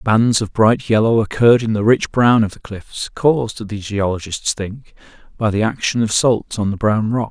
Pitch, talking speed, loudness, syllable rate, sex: 110 Hz, 205 wpm, -17 LUFS, 4.7 syllables/s, male